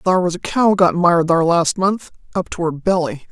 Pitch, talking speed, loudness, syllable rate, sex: 175 Hz, 235 wpm, -17 LUFS, 5.1 syllables/s, female